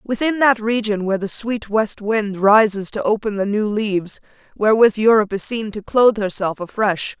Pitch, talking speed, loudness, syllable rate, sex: 210 Hz, 185 wpm, -18 LUFS, 5.2 syllables/s, female